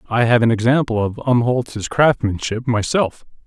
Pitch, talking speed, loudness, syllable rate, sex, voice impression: 120 Hz, 140 wpm, -18 LUFS, 4.6 syllables/s, male, masculine, adult-like, slightly thick, tensed, powerful, slightly hard, clear, fluent, cool, intellectual, calm, slightly mature, reassuring, wild, lively, slightly kind